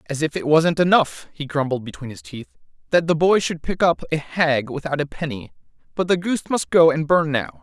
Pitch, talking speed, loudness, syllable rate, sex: 155 Hz, 230 wpm, -20 LUFS, 5.4 syllables/s, male